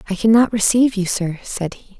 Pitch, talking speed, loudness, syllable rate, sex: 205 Hz, 210 wpm, -17 LUFS, 5.8 syllables/s, female